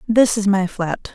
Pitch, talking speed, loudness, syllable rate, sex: 200 Hz, 210 wpm, -18 LUFS, 4.0 syllables/s, female